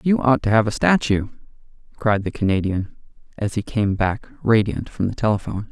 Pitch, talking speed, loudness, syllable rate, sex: 110 Hz, 180 wpm, -21 LUFS, 5.3 syllables/s, male